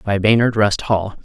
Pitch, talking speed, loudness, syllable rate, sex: 105 Hz, 195 wpm, -16 LUFS, 4.5 syllables/s, male